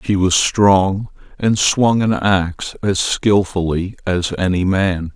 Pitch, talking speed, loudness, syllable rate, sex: 95 Hz, 140 wpm, -16 LUFS, 3.3 syllables/s, male